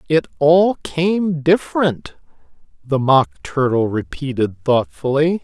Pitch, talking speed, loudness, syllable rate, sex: 145 Hz, 100 wpm, -17 LUFS, 3.6 syllables/s, male